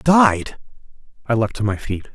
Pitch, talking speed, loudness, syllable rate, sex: 120 Hz, 170 wpm, -19 LUFS, 5.0 syllables/s, male